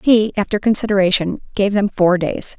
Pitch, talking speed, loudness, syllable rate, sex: 200 Hz, 160 wpm, -17 LUFS, 5.2 syllables/s, female